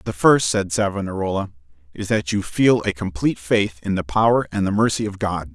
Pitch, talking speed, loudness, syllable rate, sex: 95 Hz, 205 wpm, -20 LUFS, 5.5 syllables/s, male